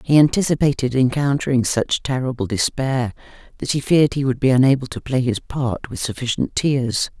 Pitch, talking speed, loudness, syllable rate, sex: 130 Hz, 165 wpm, -19 LUFS, 5.3 syllables/s, female